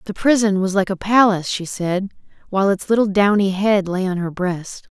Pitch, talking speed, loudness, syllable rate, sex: 195 Hz, 205 wpm, -18 LUFS, 5.3 syllables/s, female